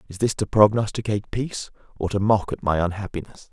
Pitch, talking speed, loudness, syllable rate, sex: 100 Hz, 190 wpm, -23 LUFS, 6.2 syllables/s, male